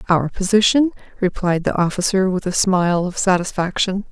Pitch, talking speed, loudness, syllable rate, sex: 190 Hz, 145 wpm, -18 LUFS, 5.3 syllables/s, female